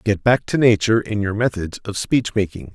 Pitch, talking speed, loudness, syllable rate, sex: 105 Hz, 220 wpm, -19 LUFS, 5.4 syllables/s, male